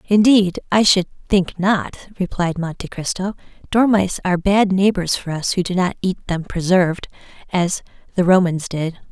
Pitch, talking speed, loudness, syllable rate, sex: 185 Hz, 160 wpm, -18 LUFS, 4.9 syllables/s, female